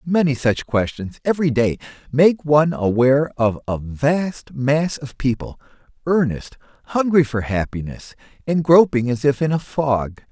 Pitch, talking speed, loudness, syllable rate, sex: 140 Hz, 145 wpm, -19 LUFS, 4.5 syllables/s, male